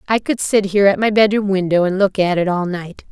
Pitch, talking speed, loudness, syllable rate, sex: 195 Hz, 270 wpm, -16 LUFS, 5.8 syllables/s, female